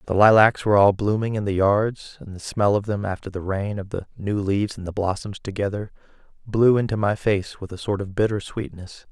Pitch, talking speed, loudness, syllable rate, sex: 100 Hz, 225 wpm, -22 LUFS, 5.4 syllables/s, male